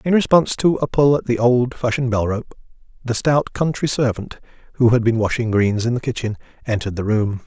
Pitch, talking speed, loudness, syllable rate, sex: 120 Hz, 200 wpm, -19 LUFS, 5.8 syllables/s, male